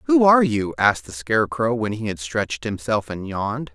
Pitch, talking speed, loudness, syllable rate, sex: 120 Hz, 210 wpm, -21 LUFS, 5.6 syllables/s, male